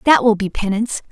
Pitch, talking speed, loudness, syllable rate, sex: 220 Hz, 215 wpm, -17 LUFS, 6.5 syllables/s, female